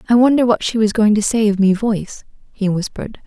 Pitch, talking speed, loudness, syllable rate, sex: 215 Hz, 240 wpm, -16 LUFS, 6.0 syllables/s, female